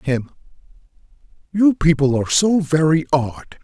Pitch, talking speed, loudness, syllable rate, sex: 155 Hz, 115 wpm, -17 LUFS, 4.3 syllables/s, male